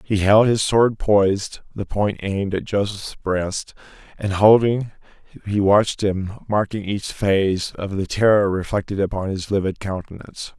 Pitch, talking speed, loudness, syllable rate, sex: 100 Hz, 155 wpm, -20 LUFS, 4.6 syllables/s, male